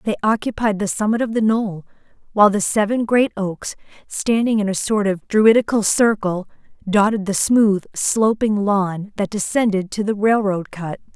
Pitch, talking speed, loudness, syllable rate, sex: 205 Hz, 160 wpm, -18 LUFS, 4.6 syllables/s, female